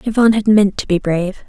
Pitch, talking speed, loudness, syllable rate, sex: 200 Hz, 245 wpm, -15 LUFS, 6.6 syllables/s, female